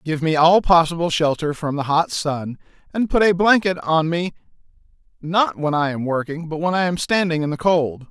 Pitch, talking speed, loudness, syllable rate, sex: 165 Hz, 205 wpm, -19 LUFS, 5.0 syllables/s, male